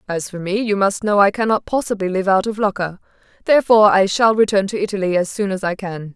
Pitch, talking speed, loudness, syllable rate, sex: 200 Hz, 235 wpm, -17 LUFS, 6.2 syllables/s, female